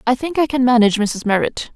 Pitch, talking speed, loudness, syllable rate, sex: 245 Hz, 240 wpm, -17 LUFS, 6.4 syllables/s, female